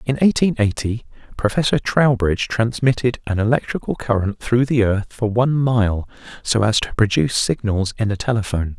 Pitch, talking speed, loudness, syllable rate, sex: 115 Hz, 155 wpm, -19 LUFS, 5.4 syllables/s, male